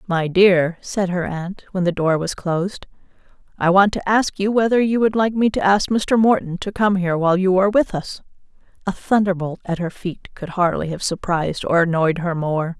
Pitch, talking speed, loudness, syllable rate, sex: 185 Hz, 210 wpm, -19 LUFS, 5.1 syllables/s, female